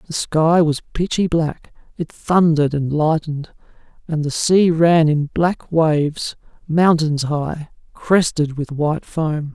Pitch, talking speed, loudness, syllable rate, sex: 155 Hz, 140 wpm, -18 LUFS, 3.9 syllables/s, male